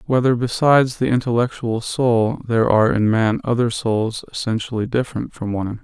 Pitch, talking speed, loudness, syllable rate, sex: 115 Hz, 165 wpm, -19 LUFS, 5.9 syllables/s, male